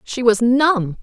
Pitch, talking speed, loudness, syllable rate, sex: 240 Hz, 175 wpm, -16 LUFS, 3.3 syllables/s, female